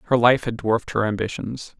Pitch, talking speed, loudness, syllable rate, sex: 115 Hz, 200 wpm, -22 LUFS, 5.7 syllables/s, male